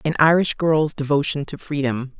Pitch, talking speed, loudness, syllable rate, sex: 150 Hz, 165 wpm, -20 LUFS, 4.9 syllables/s, female